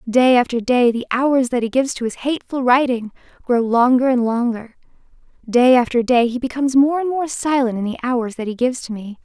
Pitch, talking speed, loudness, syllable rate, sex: 250 Hz, 215 wpm, -18 LUFS, 5.7 syllables/s, female